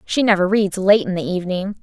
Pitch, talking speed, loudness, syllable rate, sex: 195 Hz, 230 wpm, -18 LUFS, 5.9 syllables/s, female